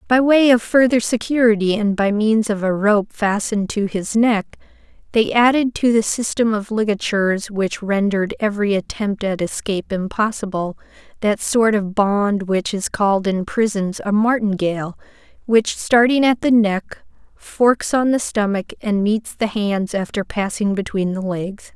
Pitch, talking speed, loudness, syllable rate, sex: 210 Hz, 160 wpm, -18 LUFS, 4.6 syllables/s, female